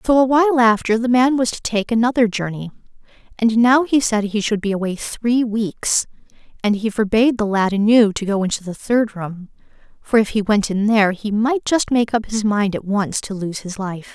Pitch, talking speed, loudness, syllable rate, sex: 220 Hz, 220 wpm, -18 LUFS, 5.1 syllables/s, female